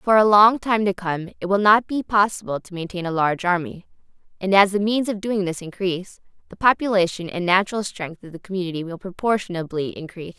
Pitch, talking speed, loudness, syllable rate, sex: 190 Hz, 200 wpm, -21 LUFS, 6.0 syllables/s, female